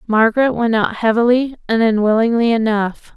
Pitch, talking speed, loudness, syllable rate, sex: 225 Hz, 135 wpm, -15 LUFS, 5.2 syllables/s, female